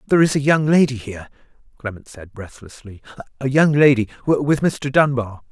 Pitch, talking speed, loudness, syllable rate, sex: 130 Hz, 150 wpm, -17 LUFS, 5.4 syllables/s, male